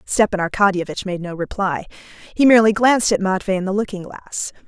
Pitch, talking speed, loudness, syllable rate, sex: 200 Hz, 180 wpm, -18 LUFS, 6.1 syllables/s, female